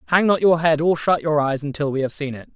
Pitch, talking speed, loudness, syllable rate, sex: 155 Hz, 305 wpm, -20 LUFS, 6.2 syllables/s, male